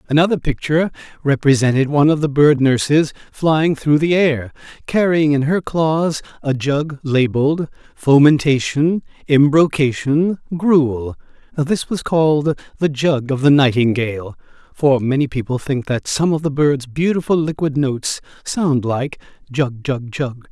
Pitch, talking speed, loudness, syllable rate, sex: 145 Hz, 135 wpm, -17 LUFS, 4.4 syllables/s, male